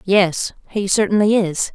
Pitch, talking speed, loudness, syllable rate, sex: 195 Hz, 140 wpm, -18 LUFS, 4.0 syllables/s, female